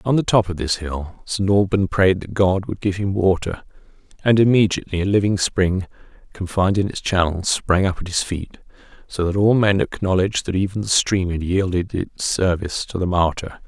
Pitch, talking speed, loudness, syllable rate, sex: 95 Hz, 195 wpm, -20 LUFS, 5.2 syllables/s, male